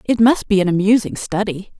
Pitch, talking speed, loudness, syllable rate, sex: 205 Hz, 200 wpm, -17 LUFS, 5.5 syllables/s, female